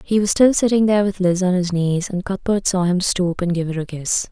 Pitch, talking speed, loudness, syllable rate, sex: 185 Hz, 280 wpm, -18 LUFS, 5.5 syllables/s, female